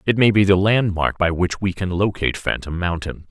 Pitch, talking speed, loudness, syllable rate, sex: 95 Hz, 220 wpm, -19 LUFS, 5.4 syllables/s, male